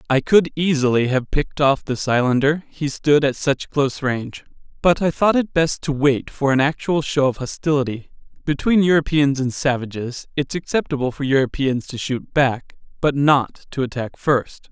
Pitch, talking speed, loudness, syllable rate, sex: 140 Hz, 175 wpm, -19 LUFS, 4.9 syllables/s, male